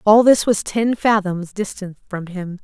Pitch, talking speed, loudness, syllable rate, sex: 200 Hz, 185 wpm, -18 LUFS, 4.2 syllables/s, female